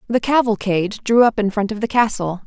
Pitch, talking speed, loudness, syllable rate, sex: 215 Hz, 220 wpm, -18 LUFS, 5.9 syllables/s, female